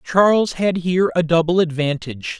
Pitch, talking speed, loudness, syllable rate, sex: 170 Hz, 150 wpm, -18 LUFS, 5.5 syllables/s, male